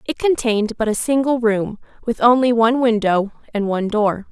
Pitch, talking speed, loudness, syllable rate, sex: 225 Hz, 180 wpm, -18 LUFS, 5.5 syllables/s, female